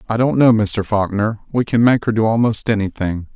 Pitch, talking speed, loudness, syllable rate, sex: 110 Hz, 215 wpm, -17 LUFS, 5.4 syllables/s, male